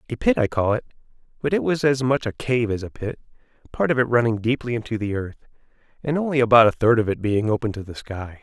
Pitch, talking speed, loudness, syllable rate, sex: 115 Hz, 250 wpm, -22 LUFS, 6.4 syllables/s, male